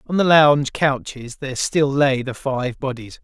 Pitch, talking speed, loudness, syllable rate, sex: 135 Hz, 185 wpm, -19 LUFS, 4.6 syllables/s, male